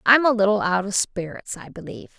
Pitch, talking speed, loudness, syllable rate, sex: 210 Hz, 220 wpm, -20 LUFS, 6.1 syllables/s, female